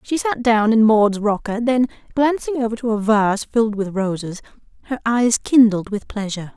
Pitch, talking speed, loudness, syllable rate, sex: 225 Hz, 185 wpm, -18 LUFS, 5.1 syllables/s, female